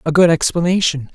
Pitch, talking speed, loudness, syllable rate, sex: 165 Hz, 155 wpm, -15 LUFS, 5.7 syllables/s, male